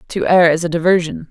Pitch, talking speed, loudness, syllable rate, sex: 170 Hz, 230 wpm, -14 LUFS, 6.1 syllables/s, female